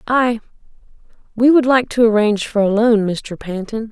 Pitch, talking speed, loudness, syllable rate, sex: 225 Hz, 155 wpm, -16 LUFS, 5.0 syllables/s, female